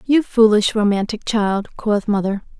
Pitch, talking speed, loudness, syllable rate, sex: 210 Hz, 140 wpm, -18 LUFS, 4.4 syllables/s, female